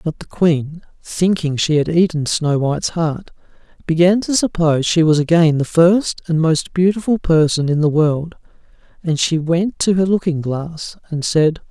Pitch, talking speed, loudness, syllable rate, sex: 165 Hz, 175 wpm, -16 LUFS, 4.5 syllables/s, male